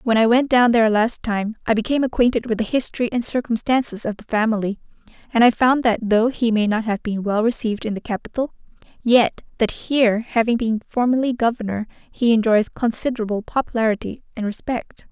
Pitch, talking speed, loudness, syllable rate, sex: 230 Hz, 185 wpm, -20 LUFS, 5.9 syllables/s, female